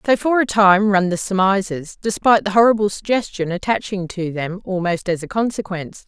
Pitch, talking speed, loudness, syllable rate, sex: 195 Hz, 180 wpm, -18 LUFS, 5.4 syllables/s, female